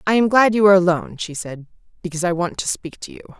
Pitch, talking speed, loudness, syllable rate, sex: 180 Hz, 265 wpm, -18 LUFS, 6.9 syllables/s, female